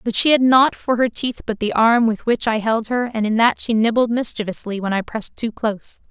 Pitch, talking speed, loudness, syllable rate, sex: 225 Hz, 255 wpm, -18 LUFS, 5.4 syllables/s, female